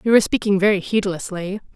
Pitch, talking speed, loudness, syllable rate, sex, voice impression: 195 Hz, 170 wpm, -20 LUFS, 6.5 syllables/s, female, very feminine, young, thin, tensed, slightly powerful, bright, soft, very clear, fluent, cute, intellectual, very refreshing, sincere, calm, very friendly, very reassuring, slightly unique, elegant, slightly wild, sweet, slightly lively, kind, slightly modest, light